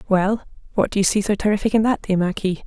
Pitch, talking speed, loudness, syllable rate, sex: 200 Hz, 250 wpm, -20 LUFS, 7.1 syllables/s, female